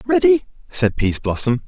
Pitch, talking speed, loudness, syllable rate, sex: 165 Hz, 110 wpm, -18 LUFS, 5.3 syllables/s, male